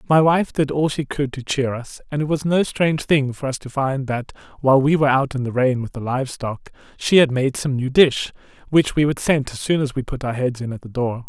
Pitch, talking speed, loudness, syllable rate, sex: 135 Hz, 275 wpm, -20 LUFS, 5.5 syllables/s, male